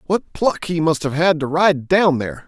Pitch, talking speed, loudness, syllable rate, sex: 160 Hz, 240 wpm, -18 LUFS, 5.0 syllables/s, male